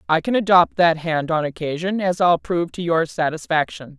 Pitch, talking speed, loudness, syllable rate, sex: 170 Hz, 195 wpm, -20 LUFS, 5.3 syllables/s, female